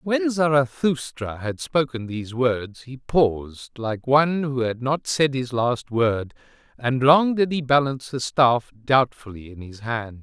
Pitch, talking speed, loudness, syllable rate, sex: 130 Hz, 165 wpm, -22 LUFS, 4.0 syllables/s, male